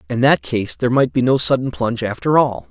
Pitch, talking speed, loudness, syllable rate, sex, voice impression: 125 Hz, 245 wpm, -17 LUFS, 5.9 syllables/s, male, masculine, adult-like, tensed, powerful, slightly clear, raspy, slightly mature, friendly, wild, lively, slightly strict